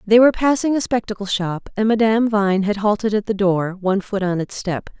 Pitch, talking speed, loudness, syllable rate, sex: 205 Hz, 230 wpm, -19 LUFS, 5.7 syllables/s, female